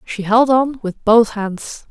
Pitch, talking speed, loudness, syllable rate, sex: 225 Hz, 190 wpm, -16 LUFS, 3.5 syllables/s, female